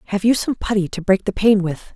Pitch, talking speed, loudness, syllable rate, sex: 205 Hz, 275 wpm, -18 LUFS, 6.2 syllables/s, female